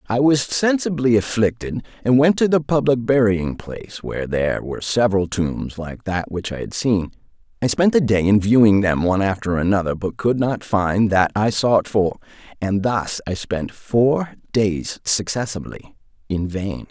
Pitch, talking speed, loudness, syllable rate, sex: 110 Hz, 175 wpm, -19 LUFS, 4.7 syllables/s, male